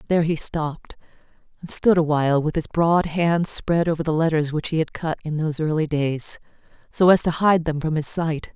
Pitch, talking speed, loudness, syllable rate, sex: 160 Hz, 215 wpm, -21 LUFS, 5.4 syllables/s, female